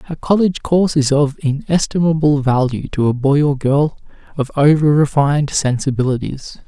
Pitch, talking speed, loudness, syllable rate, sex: 145 Hz, 145 wpm, -16 LUFS, 5.2 syllables/s, male